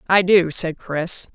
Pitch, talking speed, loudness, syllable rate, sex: 175 Hz, 180 wpm, -18 LUFS, 3.5 syllables/s, female